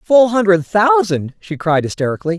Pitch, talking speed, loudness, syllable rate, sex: 190 Hz, 150 wpm, -15 LUFS, 5.3 syllables/s, male